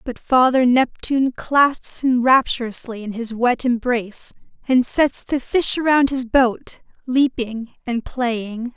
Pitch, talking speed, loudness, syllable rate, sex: 250 Hz, 135 wpm, -19 LUFS, 3.8 syllables/s, female